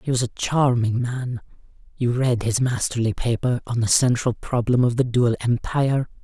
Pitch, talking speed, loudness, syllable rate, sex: 120 Hz, 175 wpm, -21 LUFS, 5.0 syllables/s, female